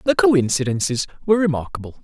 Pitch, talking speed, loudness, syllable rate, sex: 160 Hz, 120 wpm, -19 LUFS, 6.4 syllables/s, male